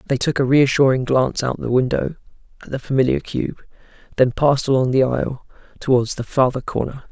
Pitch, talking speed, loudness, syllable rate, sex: 130 Hz, 175 wpm, -19 LUFS, 5.9 syllables/s, male